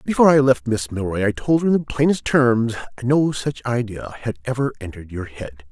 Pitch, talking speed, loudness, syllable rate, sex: 120 Hz, 210 wpm, -20 LUFS, 5.5 syllables/s, male